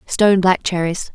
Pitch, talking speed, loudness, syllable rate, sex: 185 Hz, 155 wpm, -16 LUFS, 4.9 syllables/s, female